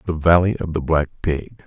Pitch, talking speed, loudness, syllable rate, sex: 80 Hz, 215 wpm, -19 LUFS, 5.2 syllables/s, male